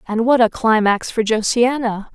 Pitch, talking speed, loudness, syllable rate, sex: 225 Hz, 170 wpm, -17 LUFS, 4.7 syllables/s, female